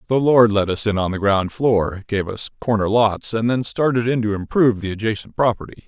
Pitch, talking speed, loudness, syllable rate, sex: 110 Hz, 225 wpm, -19 LUFS, 5.4 syllables/s, male